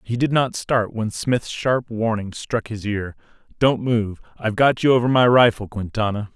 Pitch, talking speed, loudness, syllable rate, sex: 115 Hz, 190 wpm, -20 LUFS, 4.6 syllables/s, male